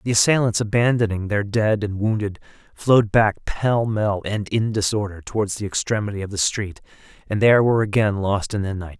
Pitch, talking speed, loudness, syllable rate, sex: 105 Hz, 185 wpm, -21 LUFS, 5.5 syllables/s, male